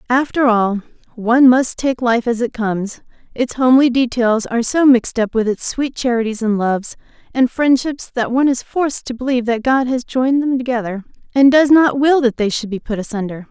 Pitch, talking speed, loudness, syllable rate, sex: 245 Hz, 205 wpm, -16 LUFS, 5.6 syllables/s, female